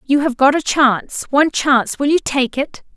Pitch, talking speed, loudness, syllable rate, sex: 275 Hz, 225 wpm, -16 LUFS, 5.2 syllables/s, female